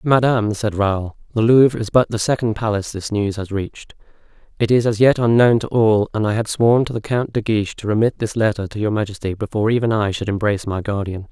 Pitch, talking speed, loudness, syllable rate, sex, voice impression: 110 Hz, 235 wpm, -18 LUFS, 6.1 syllables/s, male, masculine, adult-like, slightly dark, refreshing, sincere, slightly kind